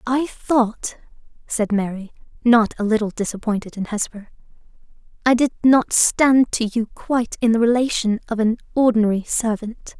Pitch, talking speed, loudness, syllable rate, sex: 230 Hz, 145 wpm, -19 LUFS, 4.8 syllables/s, female